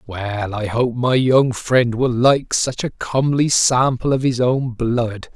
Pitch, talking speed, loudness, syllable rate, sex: 125 Hz, 180 wpm, -18 LUFS, 3.7 syllables/s, male